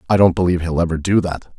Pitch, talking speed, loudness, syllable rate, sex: 85 Hz, 265 wpm, -17 LUFS, 7.1 syllables/s, male